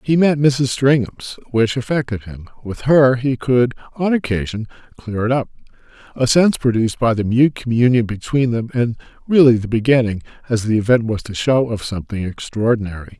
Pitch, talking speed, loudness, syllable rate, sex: 120 Hz, 170 wpm, -17 LUFS, 5.4 syllables/s, male